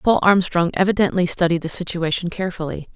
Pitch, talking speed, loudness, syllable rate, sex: 175 Hz, 140 wpm, -19 LUFS, 6.1 syllables/s, female